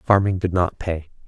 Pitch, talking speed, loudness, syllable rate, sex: 90 Hz, 190 wpm, -22 LUFS, 4.6 syllables/s, male